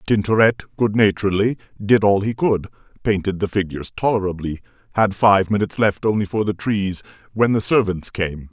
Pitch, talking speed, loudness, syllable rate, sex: 100 Hz, 150 wpm, -19 LUFS, 5.5 syllables/s, male